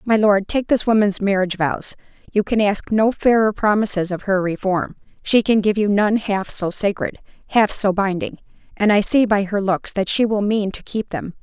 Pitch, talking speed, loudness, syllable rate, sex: 205 Hz, 200 wpm, -19 LUFS, 4.9 syllables/s, female